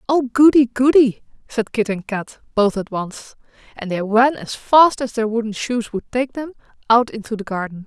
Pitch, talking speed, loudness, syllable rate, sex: 235 Hz, 200 wpm, -18 LUFS, 4.8 syllables/s, female